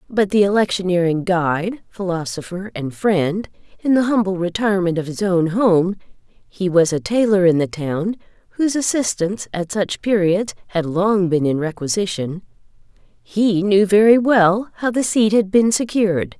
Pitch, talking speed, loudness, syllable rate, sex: 190 Hz, 145 wpm, -18 LUFS, 4.9 syllables/s, female